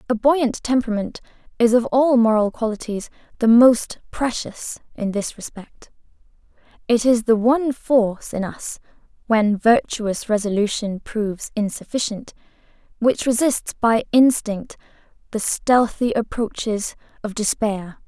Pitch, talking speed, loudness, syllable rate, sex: 230 Hz, 110 wpm, -20 LUFS, 4.3 syllables/s, female